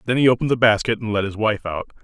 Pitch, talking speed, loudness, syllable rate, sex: 110 Hz, 295 wpm, -19 LUFS, 7.4 syllables/s, male